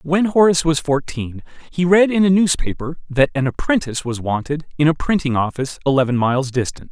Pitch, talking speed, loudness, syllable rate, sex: 150 Hz, 180 wpm, -18 LUFS, 5.9 syllables/s, male